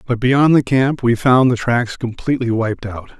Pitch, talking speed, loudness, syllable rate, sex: 120 Hz, 205 wpm, -16 LUFS, 4.6 syllables/s, male